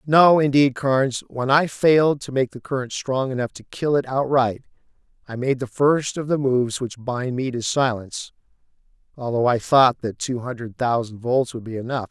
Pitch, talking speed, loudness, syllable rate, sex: 130 Hz, 195 wpm, -21 LUFS, 5.0 syllables/s, male